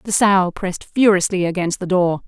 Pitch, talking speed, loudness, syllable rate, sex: 185 Hz, 185 wpm, -17 LUFS, 5.2 syllables/s, female